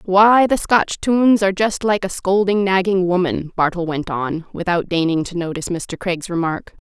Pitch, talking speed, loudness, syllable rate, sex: 185 Hz, 185 wpm, -18 LUFS, 4.9 syllables/s, female